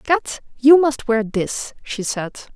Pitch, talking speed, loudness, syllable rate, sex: 245 Hz, 165 wpm, -18 LUFS, 3.2 syllables/s, female